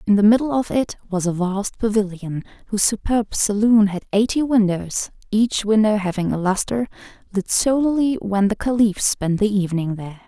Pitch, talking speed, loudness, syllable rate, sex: 210 Hz, 170 wpm, -20 LUFS, 5.2 syllables/s, female